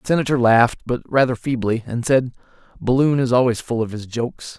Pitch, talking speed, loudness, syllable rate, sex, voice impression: 125 Hz, 195 wpm, -19 LUFS, 5.7 syllables/s, male, masculine, adult-like, slightly muffled, intellectual, sincere, slightly sweet